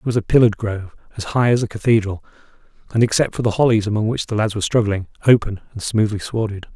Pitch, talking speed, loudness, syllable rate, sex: 110 Hz, 220 wpm, -19 LUFS, 7.0 syllables/s, male